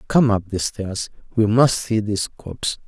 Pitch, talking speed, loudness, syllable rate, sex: 110 Hz, 190 wpm, -21 LUFS, 4.3 syllables/s, male